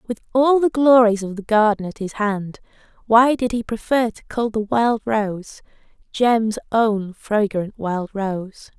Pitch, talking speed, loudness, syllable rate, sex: 220 Hz, 155 wpm, -19 LUFS, 3.8 syllables/s, female